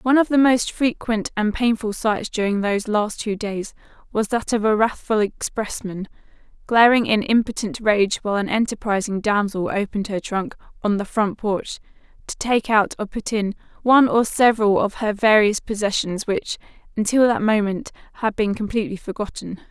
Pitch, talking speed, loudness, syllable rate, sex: 215 Hz, 165 wpm, -20 LUFS, 5.2 syllables/s, female